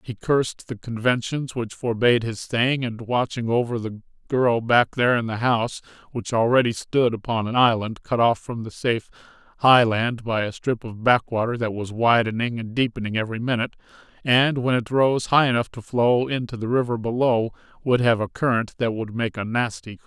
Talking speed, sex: 195 wpm, male